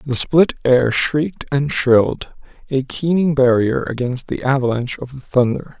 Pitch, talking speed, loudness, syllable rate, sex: 135 Hz, 155 wpm, -17 LUFS, 4.6 syllables/s, male